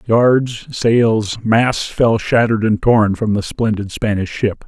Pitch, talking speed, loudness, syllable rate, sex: 110 Hz, 155 wpm, -16 LUFS, 3.6 syllables/s, male